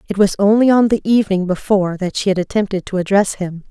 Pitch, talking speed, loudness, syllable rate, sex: 195 Hz, 225 wpm, -16 LUFS, 6.4 syllables/s, female